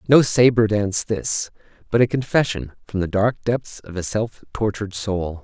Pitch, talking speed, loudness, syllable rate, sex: 105 Hz, 175 wpm, -21 LUFS, 4.7 syllables/s, male